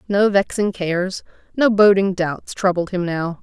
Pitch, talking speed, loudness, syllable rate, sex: 190 Hz, 155 wpm, -18 LUFS, 4.4 syllables/s, female